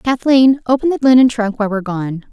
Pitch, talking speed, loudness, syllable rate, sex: 235 Hz, 205 wpm, -14 LUFS, 6.1 syllables/s, female